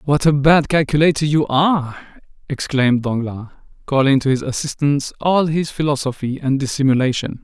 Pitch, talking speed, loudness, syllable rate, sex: 140 Hz, 135 wpm, -17 LUFS, 5.5 syllables/s, male